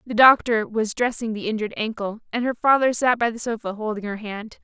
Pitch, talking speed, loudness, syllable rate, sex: 225 Hz, 220 wpm, -22 LUFS, 5.7 syllables/s, female